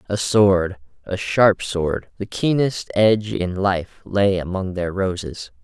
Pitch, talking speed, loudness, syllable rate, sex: 95 Hz, 150 wpm, -20 LUFS, 3.6 syllables/s, male